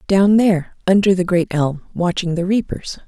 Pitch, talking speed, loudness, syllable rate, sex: 185 Hz, 175 wpm, -17 LUFS, 5.0 syllables/s, female